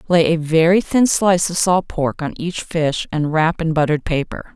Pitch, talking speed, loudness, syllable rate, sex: 165 Hz, 210 wpm, -17 LUFS, 4.9 syllables/s, female